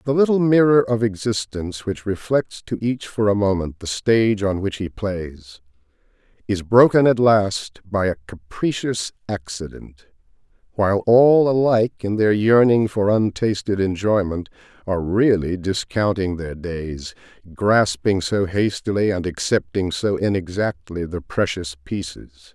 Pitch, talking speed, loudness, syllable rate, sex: 100 Hz, 135 wpm, -20 LUFS, 4.4 syllables/s, male